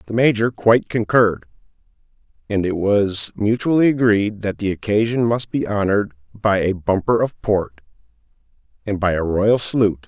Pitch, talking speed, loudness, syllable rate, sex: 105 Hz, 150 wpm, -18 LUFS, 5.1 syllables/s, male